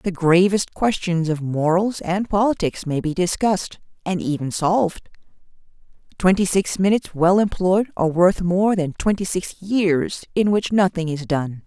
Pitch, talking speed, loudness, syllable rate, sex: 180 Hz, 155 wpm, -20 LUFS, 4.5 syllables/s, female